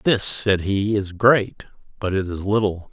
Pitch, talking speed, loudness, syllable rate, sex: 100 Hz, 185 wpm, -20 LUFS, 4.0 syllables/s, male